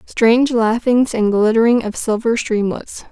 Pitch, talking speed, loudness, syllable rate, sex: 230 Hz, 135 wpm, -16 LUFS, 4.4 syllables/s, female